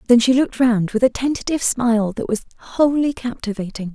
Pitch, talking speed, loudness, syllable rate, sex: 240 Hz, 180 wpm, -19 LUFS, 5.9 syllables/s, female